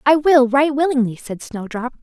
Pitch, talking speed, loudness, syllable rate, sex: 265 Hz, 180 wpm, -17 LUFS, 4.9 syllables/s, female